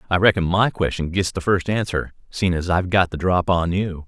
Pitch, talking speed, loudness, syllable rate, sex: 90 Hz, 235 wpm, -20 LUFS, 5.4 syllables/s, male